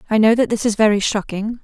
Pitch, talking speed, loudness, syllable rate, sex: 215 Hz, 255 wpm, -17 LUFS, 6.3 syllables/s, female